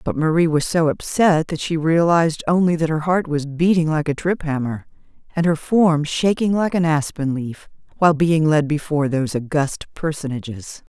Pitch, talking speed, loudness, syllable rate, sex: 155 Hz, 180 wpm, -19 LUFS, 5.1 syllables/s, female